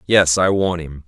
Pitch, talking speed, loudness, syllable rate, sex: 85 Hz, 225 wpm, -16 LUFS, 4.3 syllables/s, male